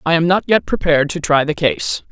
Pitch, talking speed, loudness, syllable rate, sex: 165 Hz, 255 wpm, -16 LUFS, 5.7 syllables/s, female